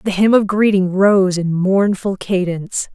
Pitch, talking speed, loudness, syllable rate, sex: 190 Hz, 165 wpm, -15 LUFS, 4.3 syllables/s, female